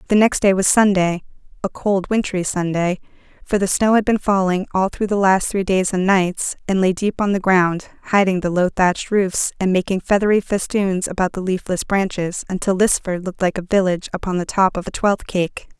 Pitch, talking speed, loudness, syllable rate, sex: 190 Hz, 205 wpm, -18 LUFS, 5.3 syllables/s, female